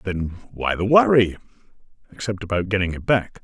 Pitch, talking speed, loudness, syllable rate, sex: 95 Hz, 155 wpm, -21 LUFS, 5.5 syllables/s, male